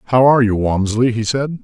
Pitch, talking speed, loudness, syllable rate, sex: 120 Hz, 220 wpm, -15 LUFS, 5.8 syllables/s, male